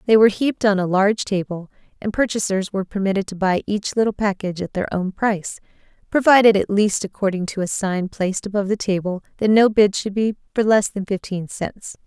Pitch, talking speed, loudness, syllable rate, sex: 200 Hz, 205 wpm, -20 LUFS, 5.9 syllables/s, female